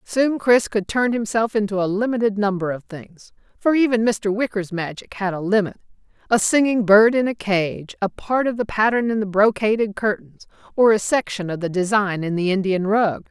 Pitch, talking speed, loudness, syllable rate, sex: 210 Hz, 200 wpm, -20 LUFS, 5.0 syllables/s, female